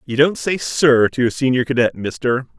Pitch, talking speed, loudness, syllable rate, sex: 135 Hz, 210 wpm, -17 LUFS, 5.0 syllables/s, male